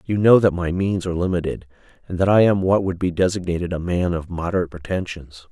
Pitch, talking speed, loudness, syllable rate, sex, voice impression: 90 Hz, 215 wpm, -20 LUFS, 6.2 syllables/s, male, very masculine, very middle-aged, very thick, tensed, very powerful, dark, slightly soft, muffled, slightly fluent, very cool, intellectual, slightly refreshing, sincere, very calm, very mature, friendly, very reassuring, very unique, elegant, slightly wild, sweet, slightly lively, very kind, modest